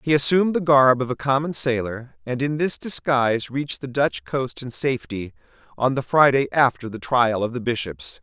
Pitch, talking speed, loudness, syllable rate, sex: 125 Hz, 195 wpm, -21 LUFS, 5.1 syllables/s, male